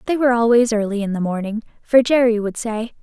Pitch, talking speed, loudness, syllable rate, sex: 225 Hz, 220 wpm, -18 LUFS, 6.1 syllables/s, female